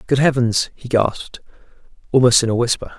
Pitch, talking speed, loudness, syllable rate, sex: 125 Hz, 160 wpm, -17 LUFS, 5.7 syllables/s, male